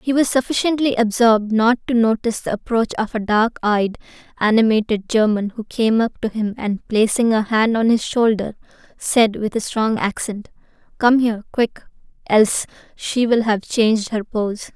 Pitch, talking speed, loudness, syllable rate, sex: 220 Hz, 170 wpm, -18 LUFS, 4.9 syllables/s, female